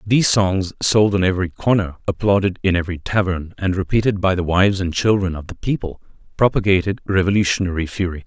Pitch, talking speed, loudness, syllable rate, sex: 95 Hz, 165 wpm, -19 LUFS, 6.1 syllables/s, male